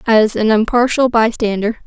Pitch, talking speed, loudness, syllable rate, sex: 225 Hz, 130 wpm, -14 LUFS, 4.8 syllables/s, female